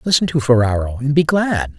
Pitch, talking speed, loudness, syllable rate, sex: 135 Hz, 200 wpm, -16 LUFS, 4.8 syllables/s, male